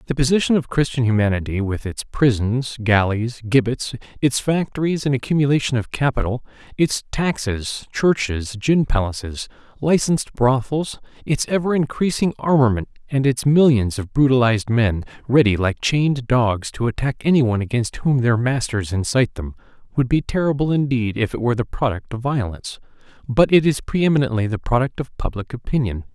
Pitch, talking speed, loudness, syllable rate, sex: 125 Hz, 155 wpm, -20 LUFS, 5.4 syllables/s, male